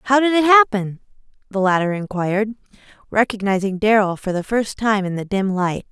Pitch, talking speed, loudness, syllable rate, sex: 210 Hz, 170 wpm, -18 LUFS, 5.2 syllables/s, female